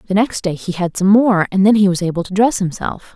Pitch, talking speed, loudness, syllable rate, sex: 195 Hz, 285 wpm, -15 LUFS, 5.8 syllables/s, female